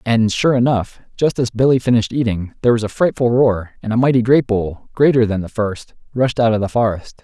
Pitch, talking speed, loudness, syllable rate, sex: 115 Hz, 225 wpm, -17 LUFS, 5.7 syllables/s, male